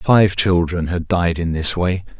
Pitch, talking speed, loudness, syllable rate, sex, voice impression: 90 Hz, 190 wpm, -18 LUFS, 3.9 syllables/s, male, very masculine, very adult-like, old, very thick, slightly relaxed, weak, slightly dark, soft, muffled, slightly halting, raspy, cool, very intellectual, very sincere, very calm, very mature, friendly, reassuring, unique, slightly elegant, wild, sweet, slightly lively, very kind, slightly modest